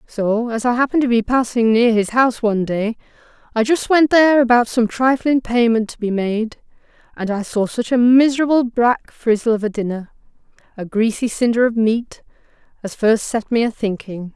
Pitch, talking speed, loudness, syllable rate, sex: 230 Hz, 185 wpm, -17 LUFS, 5.2 syllables/s, female